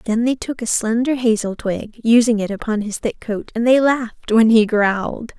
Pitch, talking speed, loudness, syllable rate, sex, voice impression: 225 Hz, 210 wpm, -18 LUFS, 4.9 syllables/s, female, feminine, slightly young, thin, weak, soft, fluent, raspy, slightly cute, friendly, reassuring, kind, modest